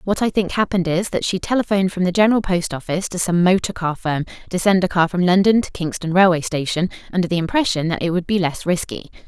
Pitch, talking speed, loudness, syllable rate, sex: 180 Hz, 240 wpm, -19 LUFS, 6.5 syllables/s, female